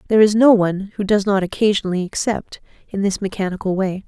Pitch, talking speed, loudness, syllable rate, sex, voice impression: 200 Hz, 190 wpm, -18 LUFS, 6.4 syllables/s, female, very feminine, slightly adult-like, thin, slightly tensed, powerful, bright, slightly soft, clear, slightly fluent, slightly cute, intellectual, refreshing, sincere, calm, friendly, reassuring, slightly unique, elegant, slightly wild, sweet, lively, strict, intense, slightly sharp, slightly light